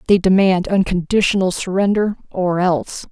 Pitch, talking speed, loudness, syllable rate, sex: 190 Hz, 115 wpm, -17 LUFS, 5.0 syllables/s, female